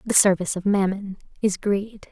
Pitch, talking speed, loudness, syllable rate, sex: 200 Hz, 170 wpm, -22 LUFS, 5.1 syllables/s, female